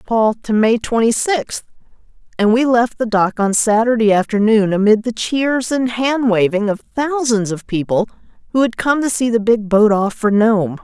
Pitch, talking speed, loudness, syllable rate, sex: 225 Hz, 190 wpm, -16 LUFS, 4.7 syllables/s, female